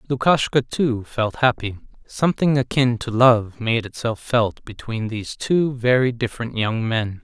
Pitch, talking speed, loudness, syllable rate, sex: 120 Hz, 150 wpm, -20 LUFS, 4.4 syllables/s, male